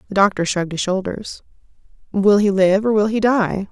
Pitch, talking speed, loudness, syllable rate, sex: 200 Hz, 195 wpm, -17 LUFS, 5.3 syllables/s, female